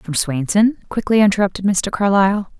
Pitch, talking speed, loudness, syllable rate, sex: 190 Hz, 140 wpm, -17 LUFS, 5.7 syllables/s, female